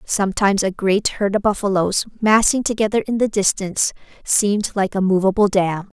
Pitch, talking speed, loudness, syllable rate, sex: 200 Hz, 160 wpm, -18 LUFS, 5.5 syllables/s, female